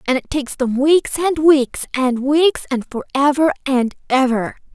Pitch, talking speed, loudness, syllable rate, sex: 275 Hz, 175 wpm, -17 LUFS, 4.4 syllables/s, female